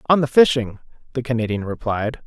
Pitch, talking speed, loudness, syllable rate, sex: 120 Hz, 160 wpm, -19 LUFS, 5.6 syllables/s, male